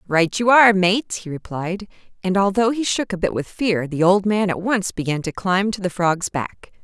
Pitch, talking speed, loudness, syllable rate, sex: 190 Hz, 230 wpm, -19 LUFS, 4.8 syllables/s, female